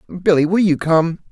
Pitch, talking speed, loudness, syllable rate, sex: 170 Hz, 185 wpm, -16 LUFS, 4.6 syllables/s, male